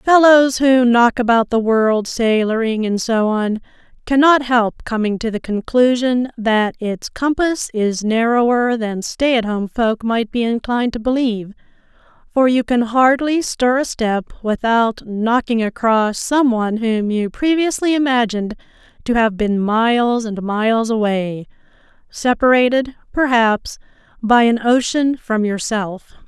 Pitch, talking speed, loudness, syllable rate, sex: 235 Hz, 140 wpm, -16 LUFS, 4.1 syllables/s, female